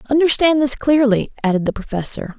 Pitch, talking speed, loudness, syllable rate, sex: 255 Hz, 150 wpm, -17 LUFS, 5.7 syllables/s, female